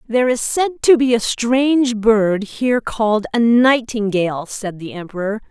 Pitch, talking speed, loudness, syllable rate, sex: 230 Hz, 165 wpm, -17 LUFS, 4.8 syllables/s, female